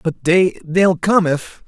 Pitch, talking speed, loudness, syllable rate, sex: 175 Hz, 110 wpm, -16 LUFS, 3.9 syllables/s, male